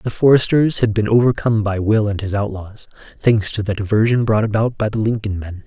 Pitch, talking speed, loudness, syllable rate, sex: 110 Hz, 210 wpm, -17 LUFS, 5.6 syllables/s, male